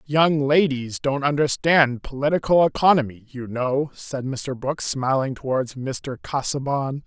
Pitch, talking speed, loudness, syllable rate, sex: 135 Hz, 125 wpm, -22 LUFS, 4.2 syllables/s, male